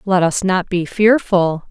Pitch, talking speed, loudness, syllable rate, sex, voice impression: 185 Hz, 175 wpm, -16 LUFS, 3.9 syllables/s, female, feminine, adult-like, intellectual, calm, slightly elegant